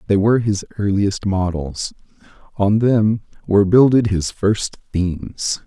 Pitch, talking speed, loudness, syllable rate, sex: 100 Hz, 125 wpm, -18 LUFS, 4.1 syllables/s, male